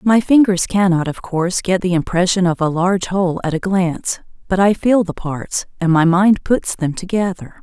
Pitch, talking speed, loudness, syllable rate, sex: 185 Hz, 205 wpm, -16 LUFS, 5.1 syllables/s, female